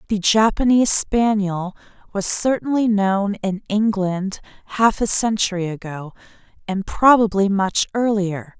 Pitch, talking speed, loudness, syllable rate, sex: 205 Hz, 110 wpm, -18 LUFS, 4.2 syllables/s, female